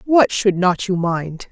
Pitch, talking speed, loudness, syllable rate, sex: 190 Hz, 200 wpm, -18 LUFS, 3.6 syllables/s, female